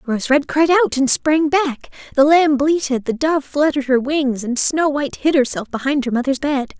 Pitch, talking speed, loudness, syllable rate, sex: 280 Hz, 210 wpm, -17 LUFS, 4.9 syllables/s, female